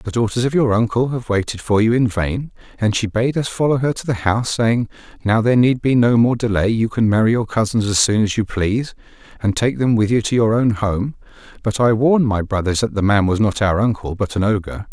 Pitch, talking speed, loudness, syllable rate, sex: 110 Hz, 250 wpm, -18 LUFS, 5.7 syllables/s, male